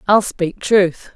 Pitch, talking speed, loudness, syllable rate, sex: 190 Hz, 155 wpm, -17 LUFS, 3.0 syllables/s, female